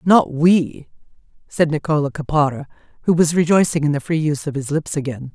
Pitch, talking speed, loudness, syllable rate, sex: 150 Hz, 180 wpm, -18 LUFS, 5.7 syllables/s, female